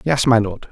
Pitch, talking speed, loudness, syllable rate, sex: 120 Hz, 250 wpm, -16 LUFS, 4.9 syllables/s, male